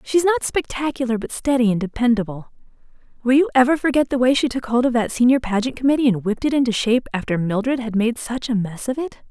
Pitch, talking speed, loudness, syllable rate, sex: 245 Hz, 225 wpm, -20 LUFS, 6.3 syllables/s, female